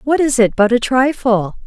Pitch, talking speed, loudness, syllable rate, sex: 245 Hz, 215 wpm, -14 LUFS, 4.9 syllables/s, female